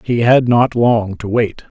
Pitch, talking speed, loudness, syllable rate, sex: 115 Hz, 200 wpm, -14 LUFS, 3.8 syllables/s, male